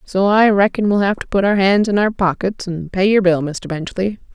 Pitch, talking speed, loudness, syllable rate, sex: 195 Hz, 250 wpm, -16 LUFS, 5.1 syllables/s, female